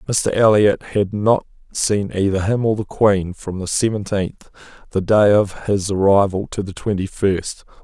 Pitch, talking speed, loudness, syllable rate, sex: 100 Hz, 170 wpm, -18 LUFS, 4.2 syllables/s, male